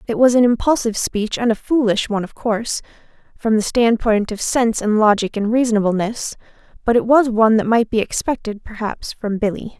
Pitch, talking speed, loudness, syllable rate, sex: 225 Hz, 190 wpm, -18 LUFS, 5.7 syllables/s, female